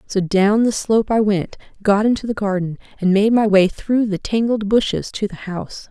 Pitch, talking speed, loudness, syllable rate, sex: 205 Hz, 215 wpm, -18 LUFS, 5.1 syllables/s, female